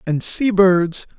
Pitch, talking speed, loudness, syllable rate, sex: 185 Hz, 150 wpm, -17 LUFS, 3.1 syllables/s, male